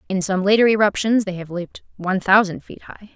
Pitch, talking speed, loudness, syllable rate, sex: 195 Hz, 210 wpm, -19 LUFS, 6.0 syllables/s, female